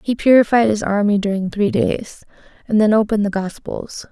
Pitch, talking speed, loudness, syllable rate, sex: 210 Hz, 175 wpm, -17 LUFS, 5.3 syllables/s, female